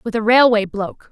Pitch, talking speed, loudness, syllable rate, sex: 225 Hz, 215 wpm, -15 LUFS, 5.9 syllables/s, female